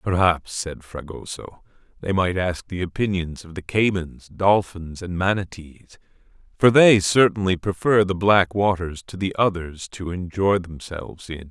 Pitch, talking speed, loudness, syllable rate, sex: 90 Hz, 145 wpm, -21 LUFS, 4.4 syllables/s, male